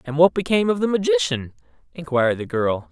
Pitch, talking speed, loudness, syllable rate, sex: 150 Hz, 185 wpm, -20 LUFS, 6.2 syllables/s, male